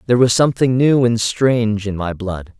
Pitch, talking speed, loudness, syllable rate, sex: 115 Hz, 210 wpm, -16 LUFS, 5.4 syllables/s, male